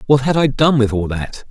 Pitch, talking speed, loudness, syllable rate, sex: 125 Hz, 280 wpm, -16 LUFS, 5.2 syllables/s, male